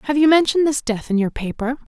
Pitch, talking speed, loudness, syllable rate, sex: 265 Hz, 245 wpm, -19 LUFS, 6.7 syllables/s, female